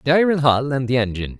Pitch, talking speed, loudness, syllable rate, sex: 135 Hz, 260 wpm, -18 LUFS, 7.1 syllables/s, male